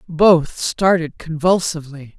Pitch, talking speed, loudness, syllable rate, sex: 160 Hz, 80 wpm, -17 LUFS, 3.9 syllables/s, female